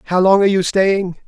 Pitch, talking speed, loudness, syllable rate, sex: 190 Hz, 235 wpm, -15 LUFS, 6.0 syllables/s, male